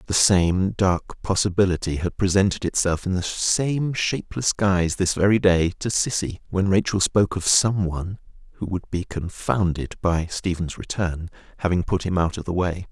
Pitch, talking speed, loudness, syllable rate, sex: 95 Hz, 170 wpm, -22 LUFS, 4.9 syllables/s, male